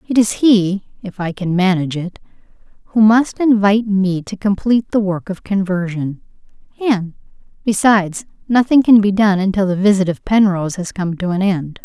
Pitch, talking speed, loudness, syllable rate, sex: 200 Hz, 165 wpm, -16 LUFS, 5.2 syllables/s, female